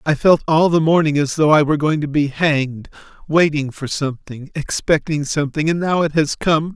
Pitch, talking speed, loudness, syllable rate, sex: 150 Hz, 205 wpm, -17 LUFS, 5.3 syllables/s, male